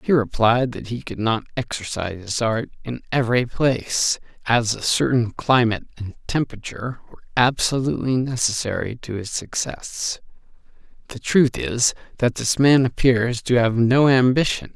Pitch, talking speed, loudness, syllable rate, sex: 120 Hz, 140 wpm, -21 LUFS, 4.9 syllables/s, male